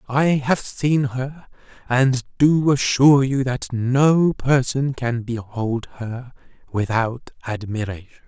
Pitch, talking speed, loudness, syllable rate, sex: 130 Hz, 115 wpm, -20 LUFS, 3.6 syllables/s, male